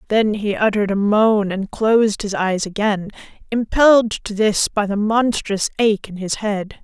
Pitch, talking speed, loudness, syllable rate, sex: 210 Hz, 175 wpm, -18 LUFS, 4.5 syllables/s, female